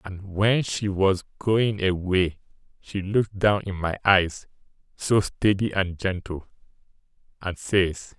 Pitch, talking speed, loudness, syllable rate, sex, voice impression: 95 Hz, 130 wpm, -24 LUFS, 3.6 syllables/s, male, masculine, adult-like, slightly muffled, slightly halting, slightly sincere, slightly calm, slightly wild